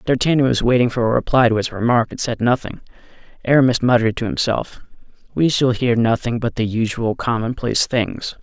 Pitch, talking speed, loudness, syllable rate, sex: 120 Hz, 180 wpm, -18 LUFS, 5.8 syllables/s, male